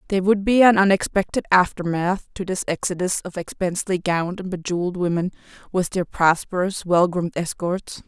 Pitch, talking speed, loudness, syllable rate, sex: 180 Hz, 155 wpm, -21 LUFS, 5.8 syllables/s, female